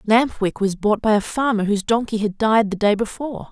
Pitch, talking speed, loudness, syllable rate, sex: 215 Hz, 240 wpm, -20 LUFS, 5.6 syllables/s, female